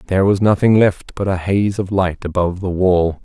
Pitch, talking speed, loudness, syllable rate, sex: 95 Hz, 220 wpm, -16 LUFS, 5.3 syllables/s, male